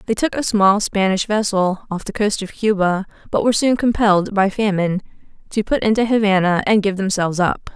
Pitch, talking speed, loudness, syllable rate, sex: 200 Hz, 195 wpm, -18 LUFS, 5.6 syllables/s, female